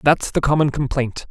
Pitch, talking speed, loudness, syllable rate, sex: 135 Hz, 185 wpm, -19 LUFS, 5.1 syllables/s, male